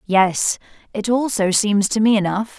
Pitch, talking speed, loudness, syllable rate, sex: 205 Hz, 165 wpm, -18 LUFS, 4.2 syllables/s, female